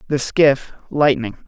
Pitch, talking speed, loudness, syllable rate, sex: 135 Hz, 120 wpm, -17 LUFS, 3.9 syllables/s, male